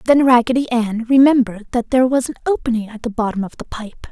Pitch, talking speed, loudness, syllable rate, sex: 240 Hz, 220 wpm, -17 LUFS, 6.4 syllables/s, female